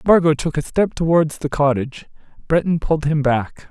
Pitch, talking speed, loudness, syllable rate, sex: 155 Hz, 180 wpm, -18 LUFS, 5.2 syllables/s, male